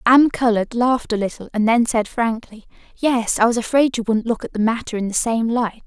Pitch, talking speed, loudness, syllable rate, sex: 230 Hz, 235 wpm, -19 LUFS, 5.9 syllables/s, female